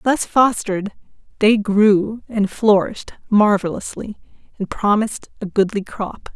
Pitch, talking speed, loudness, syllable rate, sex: 210 Hz, 115 wpm, -18 LUFS, 4.3 syllables/s, female